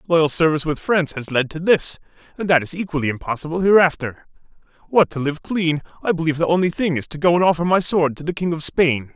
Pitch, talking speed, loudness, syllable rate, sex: 160 Hz, 230 wpm, -19 LUFS, 6.3 syllables/s, male